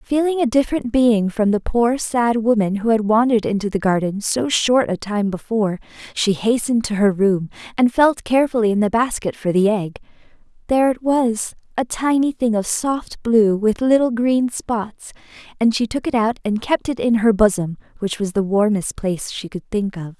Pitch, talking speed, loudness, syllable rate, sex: 225 Hz, 200 wpm, -19 LUFS, 5.0 syllables/s, female